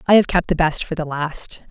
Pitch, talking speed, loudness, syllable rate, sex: 165 Hz, 280 wpm, -20 LUFS, 5.2 syllables/s, female